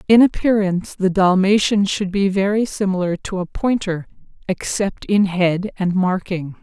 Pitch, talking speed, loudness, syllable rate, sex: 195 Hz, 145 wpm, -18 LUFS, 4.5 syllables/s, female